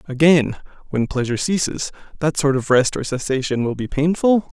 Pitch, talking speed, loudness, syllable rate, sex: 145 Hz, 170 wpm, -19 LUFS, 5.3 syllables/s, male